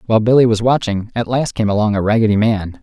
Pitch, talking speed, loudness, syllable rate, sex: 110 Hz, 235 wpm, -15 LUFS, 6.4 syllables/s, male